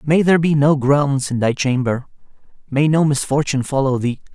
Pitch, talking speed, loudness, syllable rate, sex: 140 Hz, 180 wpm, -17 LUFS, 5.4 syllables/s, male